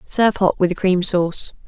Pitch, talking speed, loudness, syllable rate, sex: 185 Hz, 215 wpm, -18 LUFS, 5.4 syllables/s, female